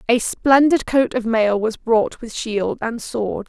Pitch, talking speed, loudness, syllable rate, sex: 230 Hz, 190 wpm, -19 LUFS, 3.6 syllables/s, female